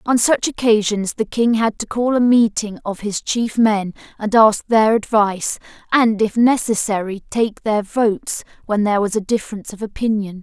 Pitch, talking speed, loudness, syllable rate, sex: 215 Hz, 180 wpm, -18 LUFS, 4.9 syllables/s, female